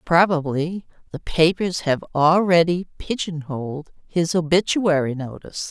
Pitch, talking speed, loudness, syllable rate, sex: 165 Hz, 105 wpm, -21 LUFS, 4.4 syllables/s, female